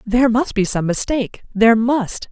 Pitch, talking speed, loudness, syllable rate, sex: 225 Hz, 180 wpm, -17 LUFS, 5.2 syllables/s, female